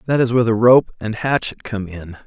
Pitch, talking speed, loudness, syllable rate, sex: 115 Hz, 240 wpm, -17 LUFS, 5.7 syllables/s, male